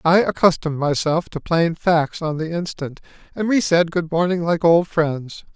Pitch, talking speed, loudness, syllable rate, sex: 165 Hz, 185 wpm, -19 LUFS, 4.6 syllables/s, male